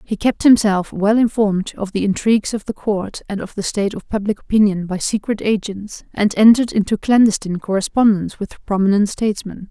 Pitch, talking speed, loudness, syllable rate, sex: 205 Hz, 180 wpm, -17 LUFS, 5.8 syllables/s, female